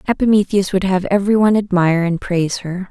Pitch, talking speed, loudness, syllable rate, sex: 190 Hz, 185 wpm, -16 LUFS, 6.6 syllables/s, female